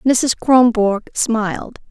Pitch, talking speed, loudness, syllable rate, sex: 230 Hz, 95 wpm, -16 LUFS, 3.1 syllables/s, female